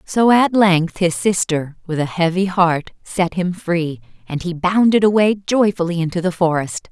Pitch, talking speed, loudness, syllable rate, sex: 180 Hz, 175 wpm, -17 LUFS, 4.4 syllables/s, female